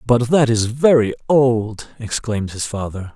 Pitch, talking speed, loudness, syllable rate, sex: 115 Hz, 150 wpm, -17 LUFS, 4.2 syllables/s, male